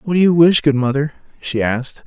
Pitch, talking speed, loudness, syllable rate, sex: 145 Hz, 235 wpm, -16 LUFS, 5.8 syllables/s, male